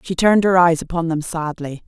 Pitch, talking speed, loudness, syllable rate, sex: 170 Hz, 225 wpm, -17 LUFS, 5.7 syllables/s, female